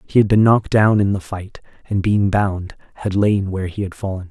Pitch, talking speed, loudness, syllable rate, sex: 100 Hz, 235 wpm, -18 LUFS, 5.5 syllables/s, male